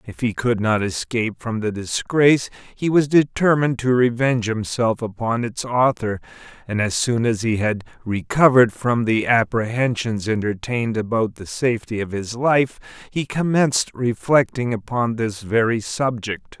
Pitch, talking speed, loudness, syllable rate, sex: 120 Hz, 150 wpm, -20 LUFS, 4.7 syllables/s, male